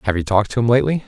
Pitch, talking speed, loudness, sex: 115 Hz, 335 wpm, -17 LUFS, male